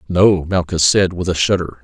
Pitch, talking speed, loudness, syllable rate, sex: 90 Hz, 195 wpm, -15 LUFS, 4.8 syllables/s, male